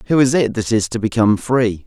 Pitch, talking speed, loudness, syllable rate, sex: 115 Hz, 255 wpm, -17 LUFS, 5.5 syllables/s, male